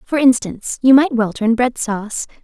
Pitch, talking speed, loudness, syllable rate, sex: 240 Hz, 195 wpm, -16 LUFS, 5.5 syllables/s, female